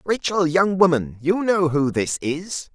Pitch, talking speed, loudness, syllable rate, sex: 170 Hz, 175 wpm, -20 LUFS, 4.0 syllables/s, male